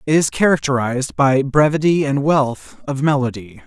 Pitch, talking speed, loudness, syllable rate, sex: 140 Hz, 145 wpm, -17 LUFS, 5.3 syllables/s, male